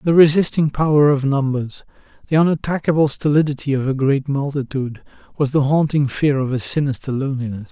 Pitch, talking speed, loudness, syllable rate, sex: 140 Hz, 155 wpm, -18 LUFS, 5.9 syllables/s, male